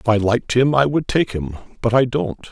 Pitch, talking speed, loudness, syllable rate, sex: 120 Hz, 265 wpm, -18 LUFS, 5.3 syllables/s, male